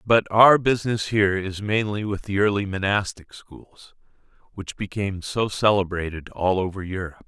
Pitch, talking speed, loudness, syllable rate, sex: 100 Hz, 150 wpm, -22 LUFS, 5.0 syllables/s, male